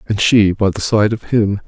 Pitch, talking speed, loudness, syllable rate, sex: 105 Hz, 250 wpm, -15 LUFS, 4.6 syllables/s, male